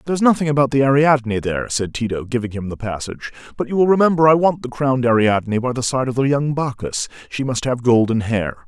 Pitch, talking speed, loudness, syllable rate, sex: 130 Hz, 230 wpm, -18 LUFS, 6.2 syllables/s, male